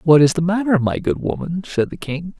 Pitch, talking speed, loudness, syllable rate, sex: 165 Hz, 250 wpm, -19 LUFS, 5.5 syllables/s, male